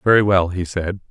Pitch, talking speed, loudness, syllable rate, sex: 95 Hz, 215 wpm, -18 LUFS, 5.4 syllables/s, male